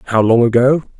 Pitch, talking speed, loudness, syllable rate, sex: 120 Hz, 180 wpm, -13 LUFS, 6.3 syllables/s, male